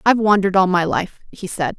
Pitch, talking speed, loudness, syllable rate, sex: 190 Hz, 235 wpm, -17 LUFS, 6.4 syllables/s, female